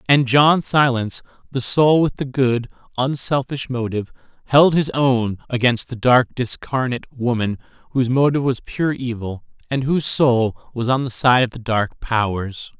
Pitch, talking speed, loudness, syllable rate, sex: 125 Hz, 160 wpm, -19 LUFS, 4.7 syllables/s, male